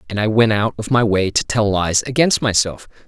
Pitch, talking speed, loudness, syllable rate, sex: 110 Hz, 235 wpm, -17 LUFS, 5.2 syllables/s, male